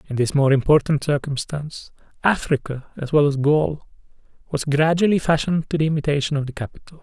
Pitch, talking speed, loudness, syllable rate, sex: 145 Hz, 160 wpm, -20 LUFS, 6.0 syllables/s, male